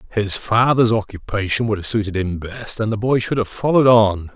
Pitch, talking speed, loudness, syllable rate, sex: 110 Hz, 205 wpm, -18 LUFS, 5.3 syllables/s, male